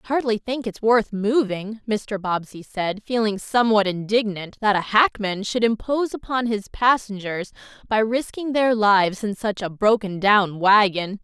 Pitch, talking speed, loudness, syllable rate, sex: 215 Hz, 165 wpm, -21 LUFS, 4.6 syllables/s, female